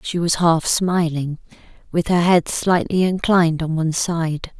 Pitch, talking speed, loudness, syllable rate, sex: 170 Hz, 155 wpm, -19 LUFS, 4.3 syllables/s, female